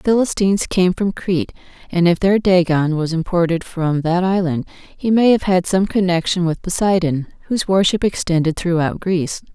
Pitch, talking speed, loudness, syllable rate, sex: 180 Hz, 170 wpm, -17 LUFS, 5.2 syllables/s, female